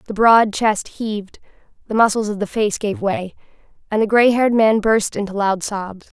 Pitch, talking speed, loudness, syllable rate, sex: 210 Hz, 195 wpm, -18 LUFS, 4.9 syllables/s, female